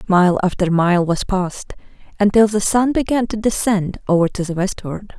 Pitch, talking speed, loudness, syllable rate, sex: 195 Hz, 175 wpm, -17 LUFS, 4.9 syllables/s, female